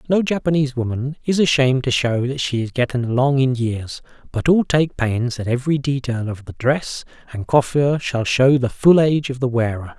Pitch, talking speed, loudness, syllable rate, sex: 130 Hz, 205 wpm, -19 LUFS, 5.4 syllables/s, male